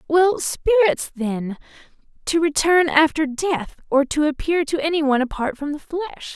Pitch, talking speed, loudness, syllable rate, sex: 305 Hz, 140 wpm, -20 LUFS, 4.5 syllables/s, female